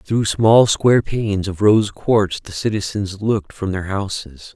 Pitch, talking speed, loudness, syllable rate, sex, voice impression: 100 Hz, 170 wpm, -18 LUFS, 4.2 syllables/s, male, masculine, adult-like, slightly middle-aged, thick, slightly relaxed, slightly weak, slightly dark, slightly hard, slightly clear, slightly fluent, slightly raspy, cool, intellectual, slightly sincere, very calm, mature, slightly friendly, reassuring, slightly unique, wild, slightly sweet, kind, very modest